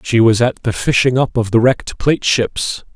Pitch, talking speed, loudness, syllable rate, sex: 120 Hz, 225 wpm, -15 LUFS, 5.0 syllables/s, male